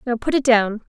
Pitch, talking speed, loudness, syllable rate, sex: 240 Hz, 255 wpm, -18 LUFS, 5.6 syllables/s, female